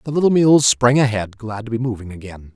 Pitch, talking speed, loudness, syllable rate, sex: 120 Hz, 235 wpm, -16 LUFS, 5.8 syllables/s, male